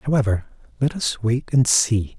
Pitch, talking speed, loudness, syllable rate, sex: 120 Hz, 165 wpm, -20 LUFS, 4.4 syllables/s, male